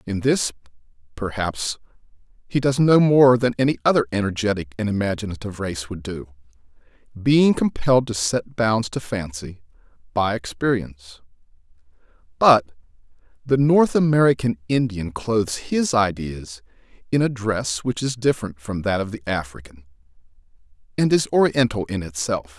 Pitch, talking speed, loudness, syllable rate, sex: 110 Hz, 130 wpm, -21 LUFS, 4.9 syllables/s, male